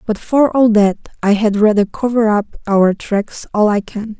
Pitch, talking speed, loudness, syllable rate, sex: 215 Hz, 200 wpm, -15 LUFS, 4.4 syllables/s, female